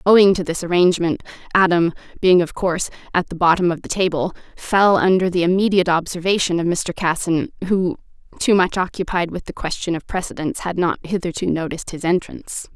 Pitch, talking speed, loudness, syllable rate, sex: 175 Hz, 175 wpm, -19 LUFS, 6.0 syllables/s, female